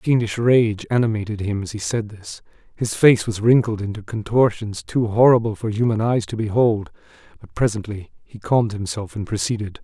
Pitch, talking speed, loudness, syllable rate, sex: 110 Hz, 175 wpm, -20 LUFS, 5.4 syllables/s, male